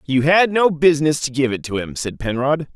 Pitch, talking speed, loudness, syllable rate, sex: 155 Hz, 240 wpm, -18 LUFS, 5.1 syllables/s, male